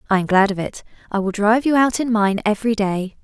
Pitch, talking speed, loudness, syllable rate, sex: 210 Hz, 260 wpm, -18 LUFS, 6.3 syllables/s, female